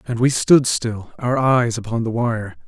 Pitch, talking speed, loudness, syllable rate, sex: 120 Hz, 200 wpm, -19 LUFS, 4.2 syllables/s, male